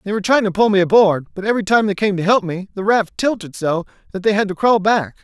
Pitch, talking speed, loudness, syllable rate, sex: 200 Hz, 285 wpm, -17 LUFS, 6.5 syllables/s, male